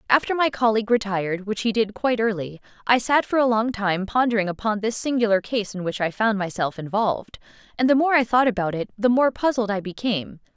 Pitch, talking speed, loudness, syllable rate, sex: 220 Hz, 215 wpm, -22 LUFS, 6.0 syllables/s, female